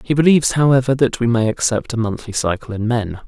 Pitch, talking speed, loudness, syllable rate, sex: 120 Hz, 220 wpm, -17 LUFS, 6.1 syllables/s, male